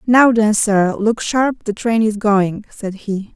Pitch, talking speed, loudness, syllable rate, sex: 215 Hz, 195 wpm, -16 LUFS, 3.5 syllables/s, female